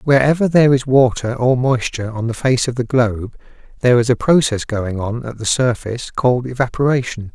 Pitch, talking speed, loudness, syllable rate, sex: 125 Hz, 190 wpm, -17 LUFS, 5.7 syllables/s, male